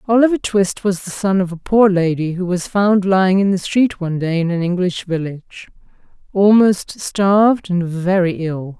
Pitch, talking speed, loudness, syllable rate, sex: 185 Hz, 185 wpm, -16 LUFS, 4.7 syllables/s, female